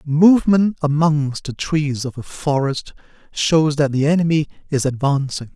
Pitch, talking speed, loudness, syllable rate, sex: 150 Hz, 140 wpm, -18 LUFS, 4.4 syllables/s, male